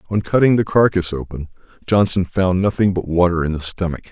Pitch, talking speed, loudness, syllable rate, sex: 90 Hz, 190 wpm, -17 LUFS, 6.1 syllables/s, male